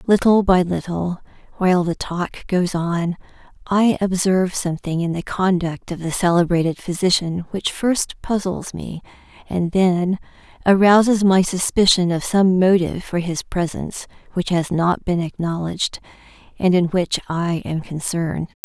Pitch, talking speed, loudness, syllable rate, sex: 180 Hz, 140 wpm, -19 LUFS, 4.6 syllables/s, female